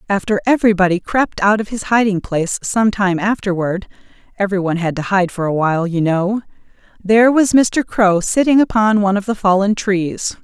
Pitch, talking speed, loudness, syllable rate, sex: 200 Hz, 180 wpm, -16 LUFS, 4.4 syllables/s, female